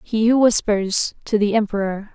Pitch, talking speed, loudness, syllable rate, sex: 210 Hz, 170 wpm, -19 LUFS, 4.6 syllables/s, female